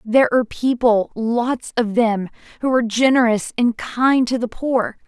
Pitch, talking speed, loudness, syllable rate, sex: 235 Hz, 165 wpm, -18 LUFS, 4.5 syllables/s, female